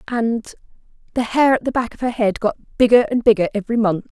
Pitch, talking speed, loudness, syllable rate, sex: 230 Hz, 215 wpm, -18 LUFS, 5.8 syllables/s, female